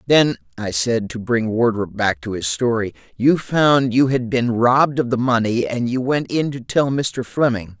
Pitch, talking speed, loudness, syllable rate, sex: 120 Hz, 210 wpm, -19 LUFS, 4.5 syllables/s, male